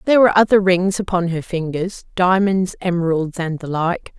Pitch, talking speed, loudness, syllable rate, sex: 180 Hz, 160 wpm, -18 LUFS, 5.2 syllables/s, female